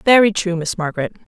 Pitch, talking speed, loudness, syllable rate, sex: 185 Hz, 175 wpm, -18 LUFS, 6.0 syllables/s, female